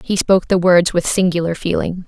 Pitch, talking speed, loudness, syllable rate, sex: 175 Hz, 205 wpm, -16 LUFS, 5.6 syllables/s, female